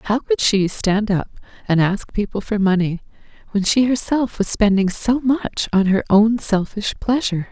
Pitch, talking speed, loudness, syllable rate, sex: 210 Hz, 175 wpm, -18 LUFS, 4.5 syllables/s, female